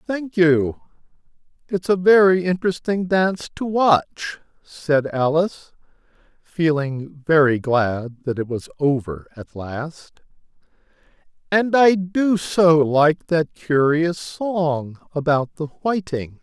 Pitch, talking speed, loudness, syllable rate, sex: 160 Hz, 115 wpm, -20 LUFS, 3.4 syllables/s, male